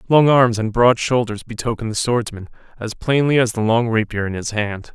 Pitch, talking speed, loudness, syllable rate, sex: 115 Hz, 205 wpm, -18 LUFS, 5.3 syllables/s, male